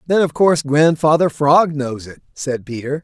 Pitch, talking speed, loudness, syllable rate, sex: 150 Hz, 180 wpm, -16 LUFS, 4.6 syllables/s, male